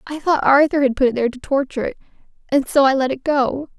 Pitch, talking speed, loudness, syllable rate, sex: 275 Hz, 255 wpm, -18 LUFS, 6.5 syllables/s, female